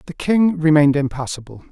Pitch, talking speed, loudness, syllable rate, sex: 155 Hz, 140 wpm, -17 LUFS, 5.9 syllables/s, male